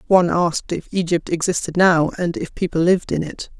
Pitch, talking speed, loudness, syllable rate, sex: 175 Hz, 200 wpm, -19 LUFS, 5.8 syllables/s, female